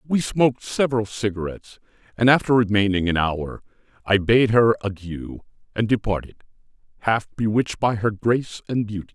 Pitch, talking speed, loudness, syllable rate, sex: 110 Hz, 145 wpm, -21 LUFS, 5.4 syllables/s, male